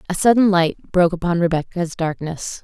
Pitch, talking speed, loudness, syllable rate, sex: 175 Hz, 160 wpm, -19 LUFS, 5.4 syllables/s, female